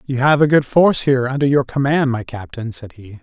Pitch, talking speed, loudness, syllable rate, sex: 130 Hz, 240 wpm, -16 LUFS, 5.8 syllables/s, male